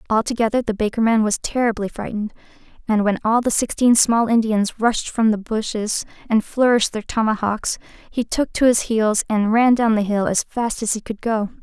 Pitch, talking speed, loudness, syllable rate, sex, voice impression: 220 Hz, 195 wpm, -19 LUFS, 5.2 syllables/s, female, feminine, slightly young, relaxed, slightly weak, slightly dark, soft, fluent, raspy, intellectual, calm, reassuring, kind, modest